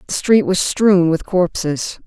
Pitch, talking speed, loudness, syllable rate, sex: 185 Hz, 175 wpm, -16 LUFS, 3.8 syllables/s, female